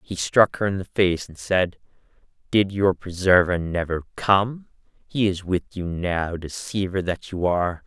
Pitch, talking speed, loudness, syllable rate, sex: 90 Hz, 170 wpm, -23 LUFS, 4.3 syllables/s, male